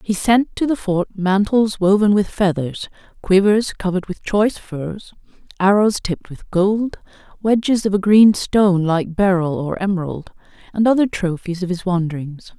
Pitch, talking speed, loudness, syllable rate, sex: 195 Hz, 155 wpm, -18 LUFS, 4.7 syllables/s, female